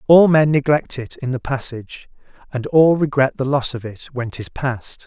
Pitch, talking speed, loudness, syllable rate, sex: 135 Hz, 200 wpm, -18 LUFS, 4.7 syllables/s, male